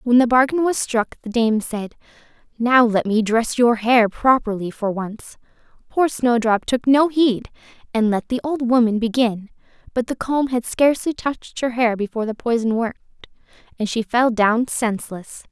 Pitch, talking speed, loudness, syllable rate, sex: 235 Hz, 175 wpm, -19 LUFS, 4.8 syllables/s, female